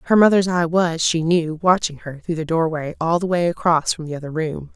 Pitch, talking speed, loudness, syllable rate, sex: 165 Hz, 255 wpm, -19 LUFS, 5.4 syllables/s, female